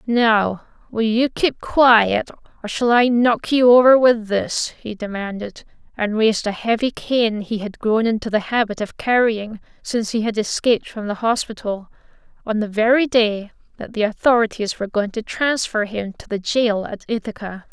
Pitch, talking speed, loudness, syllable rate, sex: 225 Hz, 175 wpm, -19 LUFS, 4.7 syllables/s, female